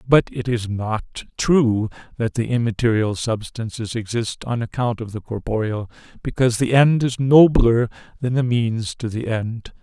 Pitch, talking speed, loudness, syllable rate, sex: 115 Hz, 160 wpm, -20 LUFS, 4.4 syllables/s, male